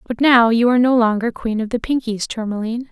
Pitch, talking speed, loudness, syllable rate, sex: 235 Hz, 225 wpm, -17 LUFS, 6.4 syllables/s, female